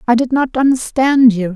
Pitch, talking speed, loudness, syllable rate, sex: 245 Hz, 195 wpm, -13 LUFS, 5.0 syllables/s, female